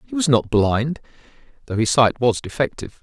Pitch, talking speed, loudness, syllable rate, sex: 125 Hz, 180 wpm, -19 LUFS, 5.3 syllables/s, male